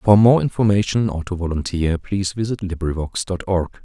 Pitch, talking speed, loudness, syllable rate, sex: 95 Hz, 170 wpm, -20 LUFS, 5.3 syllables/s, male